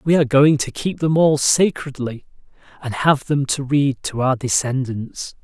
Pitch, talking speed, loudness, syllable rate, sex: 140 Hz, 175 wpm, -18 LUFS, 4.4 syllables/s, male